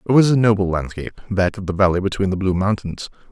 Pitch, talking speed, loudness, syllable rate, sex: 100 Hz, 235 wpm, -19 LUFS, 6.6 syllables/s, male